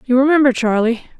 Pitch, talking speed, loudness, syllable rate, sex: 250 Hz, 150 wpm, -15 LUFS, 6.3 syllables/s, female